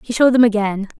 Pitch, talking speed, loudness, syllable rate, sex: 225 Hz, 240 wpm, -15 LUFS, 7.4 syllables/s, female